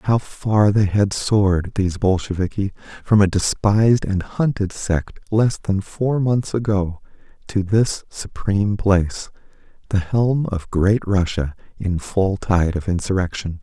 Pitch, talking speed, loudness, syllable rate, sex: 100 Hz, 140 wpm, -20 LUFS, 4.1 syllables/s, male